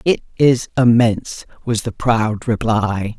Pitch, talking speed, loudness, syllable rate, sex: 115 Hz, 130 wpm, -17 LUFS, 3.8 syllables/s, female